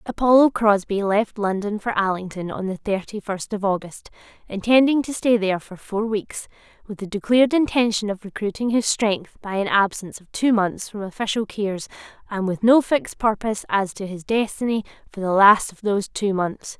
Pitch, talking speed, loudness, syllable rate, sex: 210 Hz, 180 wpm, -21 LUFS, 5.2 syllables/s, female